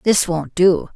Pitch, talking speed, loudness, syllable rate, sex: 180 Hz, 190 wpm, -17 LUFS, 3.7 syllables/s, female